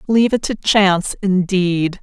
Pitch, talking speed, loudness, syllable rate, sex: 195 Hz, 150 wpm, -16 LUFS, 4.4 syllables/s, female